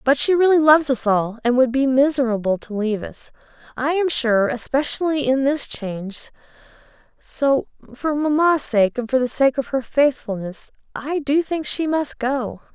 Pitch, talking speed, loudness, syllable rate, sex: 265 Hz, 170 wpm, -20 LUFS, 4.7 syllables/s, female